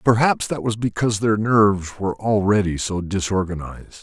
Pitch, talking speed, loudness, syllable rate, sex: 105 Hz, 150 wpm, -20 LUFS, 5.7 syllables/s, male